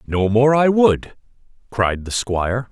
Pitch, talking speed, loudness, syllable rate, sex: 120 Hz, 155 wpm, -17 LUFS, 3.9 syllables/s, male